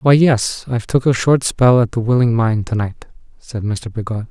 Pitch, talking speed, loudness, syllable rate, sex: 120 Hz, 210 wpm, -16 LUFS, 5.1 syllables/s, male